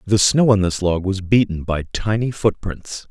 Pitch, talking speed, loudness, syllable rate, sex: 100 Hz, 195 wpm, -18 LUFS, 4.5 syllables/s, male